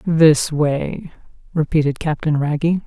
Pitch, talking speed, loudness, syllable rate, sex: 155 Hz, 105 wpm, -18 LUFS, 3.9 syllables/s, female